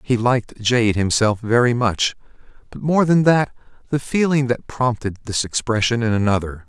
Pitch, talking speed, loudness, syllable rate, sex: 120 Hz, 160 wpm, -19 LUFS, 4.8 syllables/s, male